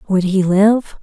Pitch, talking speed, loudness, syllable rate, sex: 195 Hz, 175 wpm, -14 LUFS, 3.5 syllables/s, female